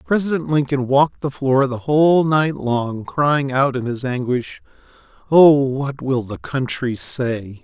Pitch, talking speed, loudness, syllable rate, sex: 135 Hz, 155 wpm, -18 LUFS, 4.0 syllables/s, male